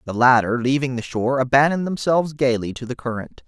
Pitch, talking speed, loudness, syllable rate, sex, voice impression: 130 Hz, 190 wpm, -20 LUFS, 6.3 syllables/s, male, very masculine, slightly middle-aged, very thick, very tensed, very powerful, bright, slightly soft, very clear, fluent, slightly raspy, slightly cool, intellectual, very refreshing, sincere, slightly calm, mature, friendly, reassuring, very unique, wild, slightly sweet, very lively, slightly kind, intense